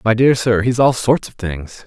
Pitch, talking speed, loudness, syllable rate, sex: 115 Hz, 260 wpm, -16 LUFS, 4.5 syllables/s, male